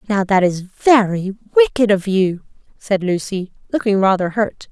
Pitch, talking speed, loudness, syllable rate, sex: 205 Hz, 155 wpm, -17 LUFS, 4.6 syllables/s, female